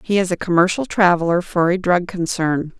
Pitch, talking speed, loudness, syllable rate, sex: 180 Hz, 195 wpm, -18 LUFS, 5.2 syllables/s, female